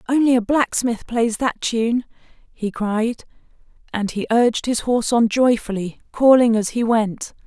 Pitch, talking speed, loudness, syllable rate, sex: 230 Hz, 155 wpm, -19 LUFS, 4.3 syllables/s, female